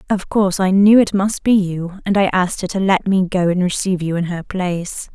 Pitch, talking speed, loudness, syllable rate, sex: 185 Hz, 255 wpm, -17 LUFS, 5.7 syllables/s, female